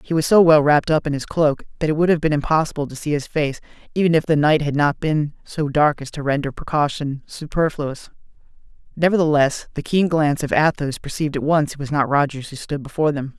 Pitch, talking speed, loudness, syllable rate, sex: 150 Hz, 225 wpm, -19 LUFS, 6.0 syllables/s, male